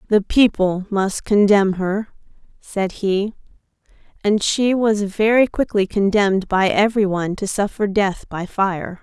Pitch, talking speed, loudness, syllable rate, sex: 200 Hz, 135 wpm, -18 LUFS, 4.1 syllables/s, female